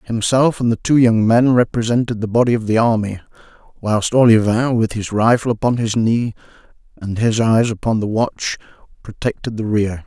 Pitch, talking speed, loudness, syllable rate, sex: 115 Hz, 175 wpm, -17 LUFS, 5.1 syllables/s, male